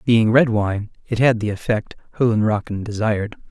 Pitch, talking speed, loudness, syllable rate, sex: 110 Hz, 155 wpm, -19 LUFS, 5.2 syllables/s, male